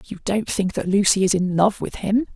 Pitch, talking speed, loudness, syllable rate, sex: 195 Hz, 255 wpm, -20 LUFS, 5.1 syllables/s, female